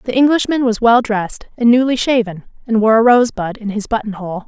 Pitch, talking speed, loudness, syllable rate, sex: 225 Hz, 200 wpm, -15 LUFS, 6.2 syllables/s, female